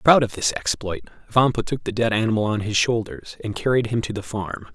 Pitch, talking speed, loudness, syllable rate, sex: 110 Hz, 230 wpm, -22 LUFS, 5.6 syllables/s, male